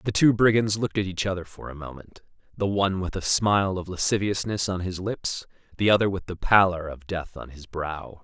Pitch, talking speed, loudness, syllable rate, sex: 95 Hz, 210 wpm, -24 LUFS, 5.5 syllables/s, male